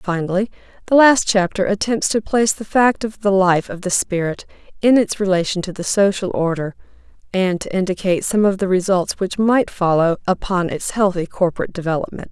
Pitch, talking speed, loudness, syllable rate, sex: 195 Hz, 180 wpm, -18 LUFS, 5.5 syllables/s, female